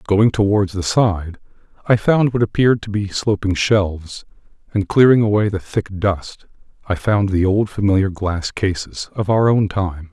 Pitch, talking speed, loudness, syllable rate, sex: 100 Hz, 170 wpm, -18 LUFS, 4.6 syllables/s, male